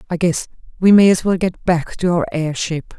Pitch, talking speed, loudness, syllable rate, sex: 175 Hz, 220 wpm, -17 LUFS, 5.0 syllables/s, female